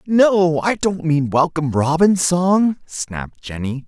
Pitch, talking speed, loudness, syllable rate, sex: 165 Hz, 140 wpm, -17 LUFS, 3.8 syllables/s, male